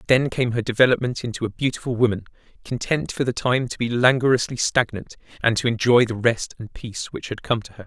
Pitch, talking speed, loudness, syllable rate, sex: 120 Hz, 215 wpm, -22 LUFS, 6.0 syllables/s, male